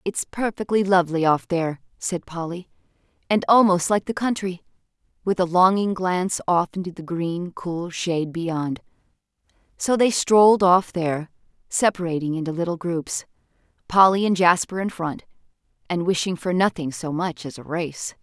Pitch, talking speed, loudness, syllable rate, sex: 175 Hz, 150 wpm, -22 LUFS, 4.9 syllables/s, female